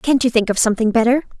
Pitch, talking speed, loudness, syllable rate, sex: 240 Hz, 255 wpm, -16 LUFS, 7.4 syllables/s, female